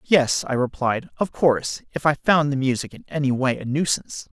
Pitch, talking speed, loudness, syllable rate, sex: 140 Hz, 205 wpm, -22 LUFS, 5.3 syllables/s, male